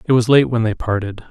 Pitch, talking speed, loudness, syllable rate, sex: 115 Hz, 275 wpm, -16 LUFS, 6.1 syllables/s, male